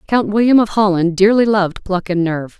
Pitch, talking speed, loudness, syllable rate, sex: 195 Hz, 210 wpm, -14 LUFS, 5.7 syllables/s, female